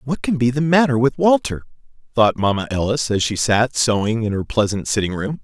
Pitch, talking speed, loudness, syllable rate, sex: 120 Hz, 210 wpm, -18 LUFS, 5.3 syllables/s, male